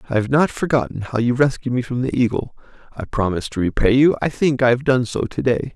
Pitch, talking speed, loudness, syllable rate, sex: 125 Hz, 250 wpm, -19 LUFS, 6.1 syllables/s, male